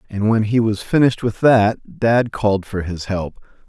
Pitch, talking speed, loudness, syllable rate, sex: 105 Hz, 195 wpm, -18 LUFS, 4.8 syllables/s, male